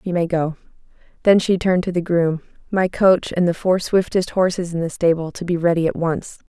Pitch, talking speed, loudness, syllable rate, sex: 175 Hz, 220 wpm, -19 LUFS, 5.4 syllables/s, female